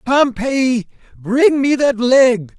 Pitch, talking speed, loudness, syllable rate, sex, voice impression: 250 Hz, 115 wpm, -14 LUFS, 2.7 syllables/s, male, masculine, adult-like, slightly fluent, cool, refreshing, slightly sincere